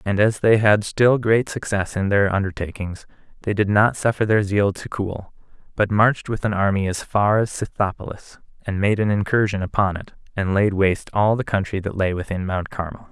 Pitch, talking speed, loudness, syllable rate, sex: 100 Hz, 200 wpm, -20 LUFS, 5.2 syllables/s, male